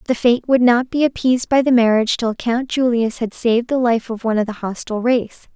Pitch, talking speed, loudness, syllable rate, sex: 240 Hz, 240 wpm, -17 LUFS, 5.9 syllables/s, female